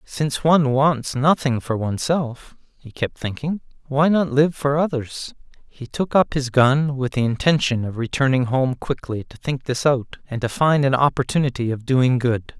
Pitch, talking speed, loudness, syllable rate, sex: 135 Hz, 180 wpm, -20 LUFS, 4.7 syllables/s, male